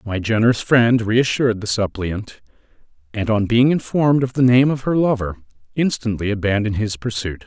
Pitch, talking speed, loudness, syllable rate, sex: 115 Hz, 160 wpm, -18 LUFS, 5.4 syllables/s, male